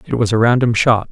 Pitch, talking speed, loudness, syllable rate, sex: 115 Hz, 270 wpm, -14 LUFS, 6.1 syllables/s, male